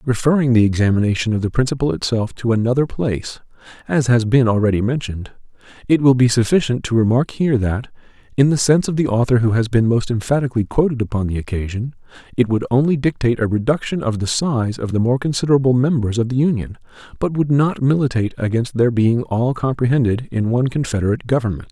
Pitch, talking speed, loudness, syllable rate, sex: 120 Hz, 190 wpm, -18 LUFS, 6.4 syllables/s, male